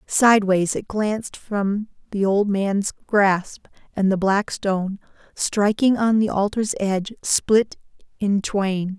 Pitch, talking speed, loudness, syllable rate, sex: 200 Hz, 135 wpm, -21 LUFS, 3.7 syllables/s, female